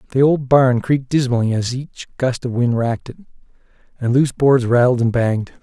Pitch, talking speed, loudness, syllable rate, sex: 125 Hz, 190 wpm, -17 LUFS, 5.8 syllables/s, male